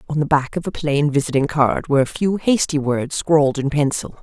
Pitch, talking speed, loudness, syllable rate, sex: 145 Hz, 225 wpm, -19 LUFS, 5.4 syllables/s, female